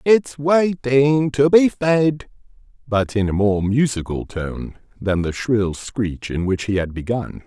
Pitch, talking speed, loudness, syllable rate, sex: 120 Hz, 160 wpm, -19 LUFS, 3.6 syllables/s, male